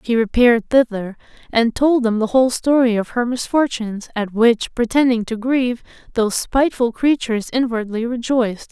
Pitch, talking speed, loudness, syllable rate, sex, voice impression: 235 Hz, 150 wpm, -18 LUFS, 5.3 syllables/s, female, very feminine, young, slightly adult-like, very thin, slightly tensed, bright, soft, very clear, very fluent, very cute, intellectual, slightly refreshing, sincere, slightly calm, friendly, slightly reassuring, slightly elegant, slightly sweet, kind, slightly light